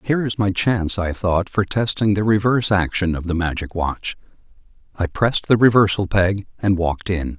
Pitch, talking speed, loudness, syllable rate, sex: 100 Hz, 185 wpm, -19 LUFS, 5.4 syllables/s, male